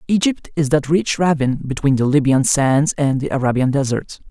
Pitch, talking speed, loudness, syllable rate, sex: 145 Hz, 180 wpm, -17 LUFS, 5.3 syllables/s, male